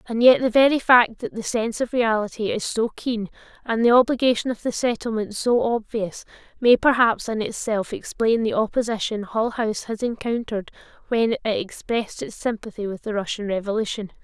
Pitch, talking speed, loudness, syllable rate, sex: 225 Hz, 175 wpm, -22 LUFS, 5.4 syllables/s, female